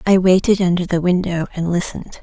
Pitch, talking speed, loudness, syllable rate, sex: 180 Hz, 190 wpm, -17 LUFS, 5.9 syllables/s, female